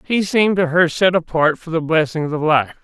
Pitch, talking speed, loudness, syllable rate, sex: 165 Hz, 235 wpm, -17 LUFS, 5.2 syllables/s, male